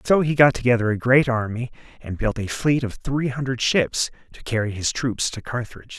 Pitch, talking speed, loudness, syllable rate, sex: 125 Hz, 210 wpm, -22 LUFS, 5.2 syllables/s, male